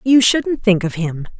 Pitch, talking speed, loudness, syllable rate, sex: 210 Hz, 215 wpm, -16 LUFS, 4.1 syllables/s, female